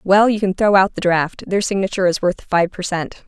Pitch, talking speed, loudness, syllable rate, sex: 190 Hz, 255 wpm, -17 LUFS, 5.4 syllables/s, female